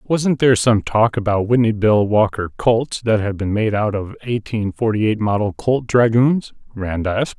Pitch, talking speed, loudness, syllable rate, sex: 110 Hz, 180 wpm, -18 LUFS, 4.8 syllables/s, male